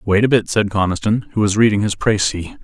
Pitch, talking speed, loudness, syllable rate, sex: 105 Hz, 230 wpm, -17 LUFS, 5.5 syllables/s, male